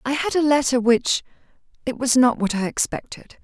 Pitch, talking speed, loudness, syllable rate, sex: 255 Hz, 175 wpm, -20 LUFS, 5.2 syllables/s, female